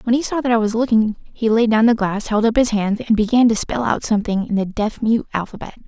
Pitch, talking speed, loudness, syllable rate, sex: 225 Hz, 275 wpm, -18 LUFS, 6.1 syllables/s, female